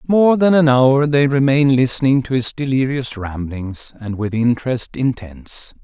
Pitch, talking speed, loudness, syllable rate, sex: 130 Hz, 155 wpm, -17 LUFS, 4.4 syllables/s, male